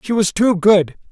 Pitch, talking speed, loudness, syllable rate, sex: 200 Hz, 215 wpm, -15 LUFS, 4.4 syllables/s, male